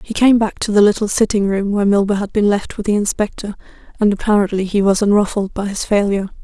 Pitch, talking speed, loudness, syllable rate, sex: 205 Hz, 225 wpm, -16 LUFS, 6.4 syllables/s, female